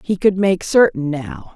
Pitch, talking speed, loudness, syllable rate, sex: 180 Hz, 195 wpm, -17 LUFS, 4.1 syllables/s, female